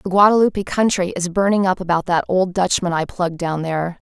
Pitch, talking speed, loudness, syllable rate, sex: 180 Hz, 205 wpm, -18 LUFS, 6.0 syllables/s, female